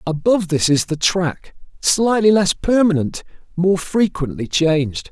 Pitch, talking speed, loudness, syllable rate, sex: 170 Hz, 130 wpm, -17 LUFS, 4.3 syllables/s, male